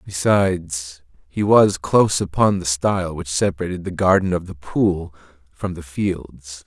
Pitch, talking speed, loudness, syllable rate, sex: 85 Hz, 155 wpm, -20 LUFS, 4.4 syllables/s, male